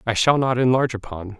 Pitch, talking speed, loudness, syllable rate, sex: 120 Hz, 215 wpm, -20 LUFS, 6.7 syllables/s, male